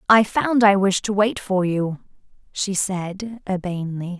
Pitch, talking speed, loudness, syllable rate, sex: 195 Hz, 155 wpm, -21 LUFS, 4.1 syllables/s, female